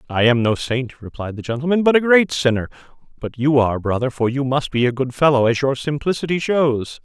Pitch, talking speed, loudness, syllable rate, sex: 135 Hz, 220 wpm, -18 LUFS, 5.7 syllables/s, male